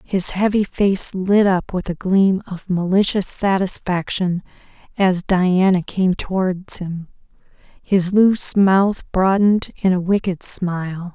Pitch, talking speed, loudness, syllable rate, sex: 185 Hz, 130 wpm, -18 LUFS, 3.8 syllables/s, female